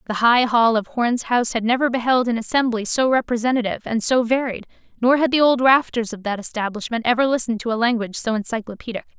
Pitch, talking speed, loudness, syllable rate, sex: 235 Hz, 205 wpm, -20 LUFS, 6.5 syllables/s, female